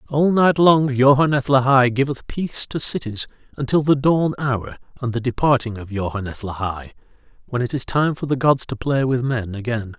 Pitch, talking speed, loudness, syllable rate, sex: 130 Hz, 185 wpm, -19 LUFS, 5.1 syllables/s, male